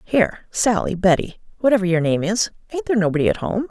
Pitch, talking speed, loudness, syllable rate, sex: 205 Hz, 160 wpm, -20 LUFS, 6.5 syllables/s, female